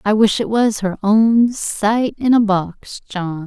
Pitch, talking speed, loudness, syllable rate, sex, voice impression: 215 Hz, 190 wpm, -16 LUFS, 3.4 syllables/s, female, feminine, young, slightly weak, slightly soft, cute, calm, friendly, kind, modest